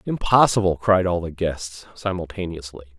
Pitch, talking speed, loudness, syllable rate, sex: 90 Hz, 120 wpm, -21 LUFS, 4.8 syllables/s, male